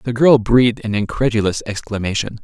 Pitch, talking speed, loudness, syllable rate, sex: 110 Hz, 150 wpm, -17 LUFS, 5.8 syllables/s, male